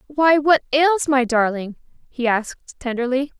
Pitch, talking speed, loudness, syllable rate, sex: 265 Hz, 140 wpm, -19 LUFS, 4.3 syllables/s, female